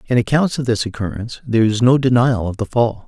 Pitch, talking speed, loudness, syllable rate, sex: 115 Hz, 235 wpm, -17 LUFS, 6.2 syllables/s, male